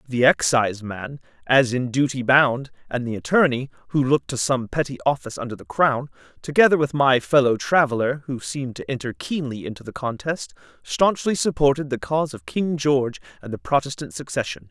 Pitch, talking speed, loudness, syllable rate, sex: 130 Hz, 175 wpm, -22 LUFS, 5.6 syllables/s, male